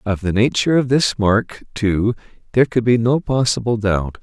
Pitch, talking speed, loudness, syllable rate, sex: 115 Hz, 185 wpm, -17 LUFS, 4.9 syllables/s, male